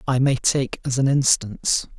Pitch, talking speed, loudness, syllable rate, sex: 130 Hz, 180 wpm, -20 LUFS, 4.7 syllables/s, male